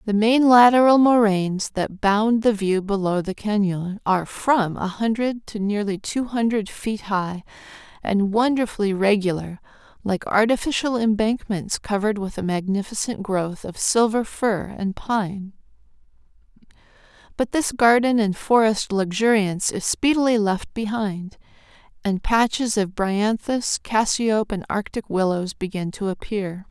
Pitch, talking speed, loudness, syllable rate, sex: 210 Hz, 130 wpm, -21 LUFS, 4.4 syllables/s, female